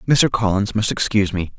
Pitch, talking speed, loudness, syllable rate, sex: 105 Hz, 190 wpm, -18 LUFS, 5.8 syllables/s, male